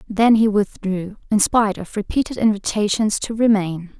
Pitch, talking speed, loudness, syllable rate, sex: 210 Hz, 150 wpm, -19 LUFS, 5.0 syllables/s, female